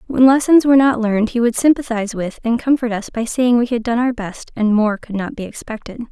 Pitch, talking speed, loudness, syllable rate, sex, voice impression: 235 Hz, 245 wpm, -16 LUFS, 5.9 syllables/s, female, very feminine, slightly young, very thin, slightly relaxed, slightly weak, slightly dark, soft, very clear, very fluent, slightly halting, very cute, very intellectual, refreshing, sincere, very calm, very friendly, very reassuring, very unique, elegant, slightly wild, very sweet, lively, kind, modest, slightly light